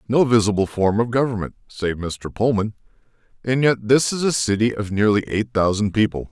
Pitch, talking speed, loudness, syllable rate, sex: 110 Hz, 180 wpm, -20 LUFS, 5.3 syllables/s, male